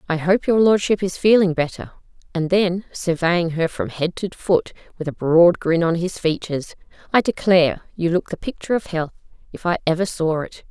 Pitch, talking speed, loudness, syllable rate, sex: 175 Hz, 195 wpm, -20 LUFS, 5.2 syllables/s, female